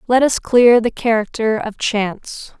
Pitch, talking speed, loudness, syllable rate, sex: 225 Hz, 160 wpm, -16 LUFS, 4.2 syllables/s, female